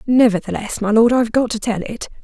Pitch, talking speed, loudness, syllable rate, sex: 225 Hz, 215 wpm, -17 LUFS, 6.1 syllables/s, female